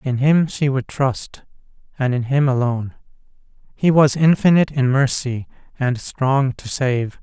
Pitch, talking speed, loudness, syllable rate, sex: 135 Hz, 150 wpm, -18 LUFS, 4.4 syllables/s, male